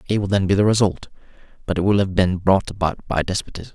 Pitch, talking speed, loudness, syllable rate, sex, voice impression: 95 Hz, 240 wpm, -20 LUFS, 6.7 syllables/s, male, very masculine, very adult-like, middle-aged, very thick, relaxed, weak, dark, slightly soft, very muffled, fluent, slightly raspy, cool, intellectual, slightly refreshing, sincere, very calm, mature, friendly, very reassuring, very unique, elegant, very sweet, slightly lively, kind, slightly modest